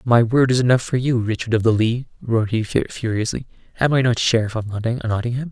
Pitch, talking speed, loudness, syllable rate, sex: 120 Hz, 205 wpm, -19 LUFS, 5.4 syllables/s, male